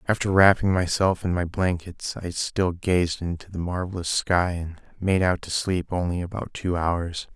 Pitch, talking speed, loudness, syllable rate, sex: 90 Hz, 180 wpm, -24 LUFS, 4.4 syllables/s, male